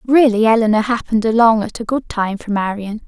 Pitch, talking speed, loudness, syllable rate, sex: 220 Hz, 195 wpm, -16 LUFS, 5.7 syllables/s, female